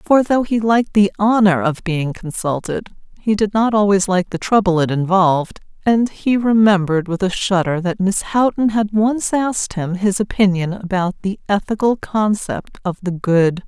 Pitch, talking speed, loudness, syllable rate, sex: 195 Hz, 175 wpm, -17 LUFS, 4.8 syllables/s, female